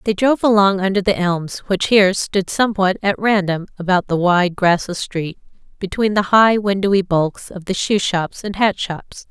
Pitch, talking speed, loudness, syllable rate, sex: 190 Hz, 185 wpm, -17 LUFS, 4.8 syllables/s, female